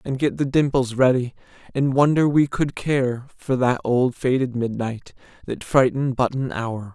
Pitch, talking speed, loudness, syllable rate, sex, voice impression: 130 Hz, 175 wpm, -21 LUFS, 4.5 syllables/s, male, masculine, adult-like, bright, soft, slightly raspy, slightly cool, refreshing, friendly, reassuring, kind